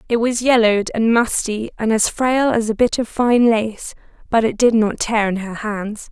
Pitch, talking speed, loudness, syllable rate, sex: 225 Hz, 215 wpm, -17 LUFS, 4.6 syllables/s, female